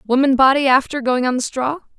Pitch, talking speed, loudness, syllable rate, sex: 265 Hz, 180 wpm, -16 LUFS, 6.1 syllables/s, female